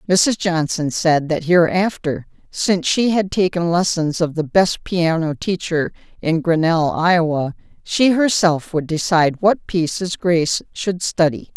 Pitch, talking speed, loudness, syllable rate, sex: 170 Hz, 140 wpm, -18 LUFS, 4.3 syllables/s, female